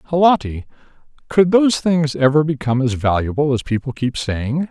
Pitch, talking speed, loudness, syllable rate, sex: 140 Hz, 155 wpm, -17 LUFS, 5.3 syllables/s, male